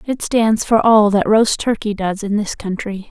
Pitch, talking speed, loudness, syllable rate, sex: 210 Hz, 210 wpm, -16 LUFS, 4.3 syllables/s, female